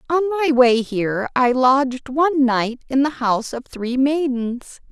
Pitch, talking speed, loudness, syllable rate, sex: 260 Hz, 170 wpm, -19 LUFS, 4.5 syllables/s, female